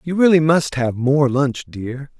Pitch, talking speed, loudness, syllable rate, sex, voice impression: 140 Hz, 190 wpm, -17 LUFS, 4.0 syllables/s, male, masculine, adult-like, very middle-aged, relaxed, weak, slightly dark, hard, slightly muffled, raspy, cool, intellectual, slightly sincere, slightly calm, very mature, slightly friendly, slightly reassuring, wild, slightly sweet, slightly lively, slightly kind, slightly intense